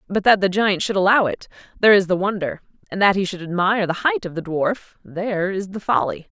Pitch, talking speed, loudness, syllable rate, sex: 195 Hz, 235 wpm, -19 LUFS, 6.0 syllables/s, female